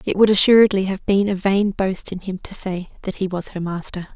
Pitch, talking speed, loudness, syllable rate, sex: 195 Hz, 245 wpm, -19 LUFS, 5.4 syllables/s, female